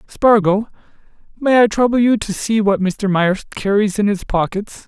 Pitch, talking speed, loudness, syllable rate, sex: 210 Hz, 160 wpm, -16 LUFS, 4.5 syllables/s, male